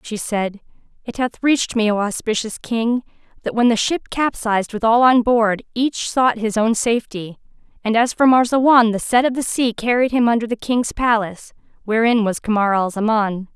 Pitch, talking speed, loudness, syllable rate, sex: 230 Hz, 190 wpm, -18 LUFS, 5.1 syllables/s, female